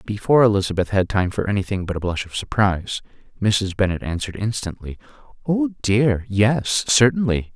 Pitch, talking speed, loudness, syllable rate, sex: 105 Hz, 135 wpm, -20 LUFS, 5.4 syllables/s, male